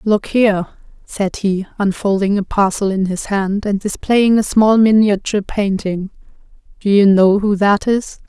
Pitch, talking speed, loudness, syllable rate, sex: 205 Hz, 160 wpm, -15 LUFS, 4.4 syllables/s, female